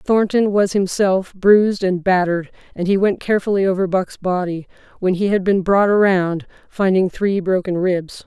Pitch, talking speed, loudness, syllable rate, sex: 190 Hz, 165 wpm, -17 LUFS, 4.8 syllables/s, female